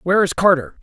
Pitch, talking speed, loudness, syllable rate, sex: 170 Hz, 220 wpm, -16 LUFS, 6.4 syllables/s, male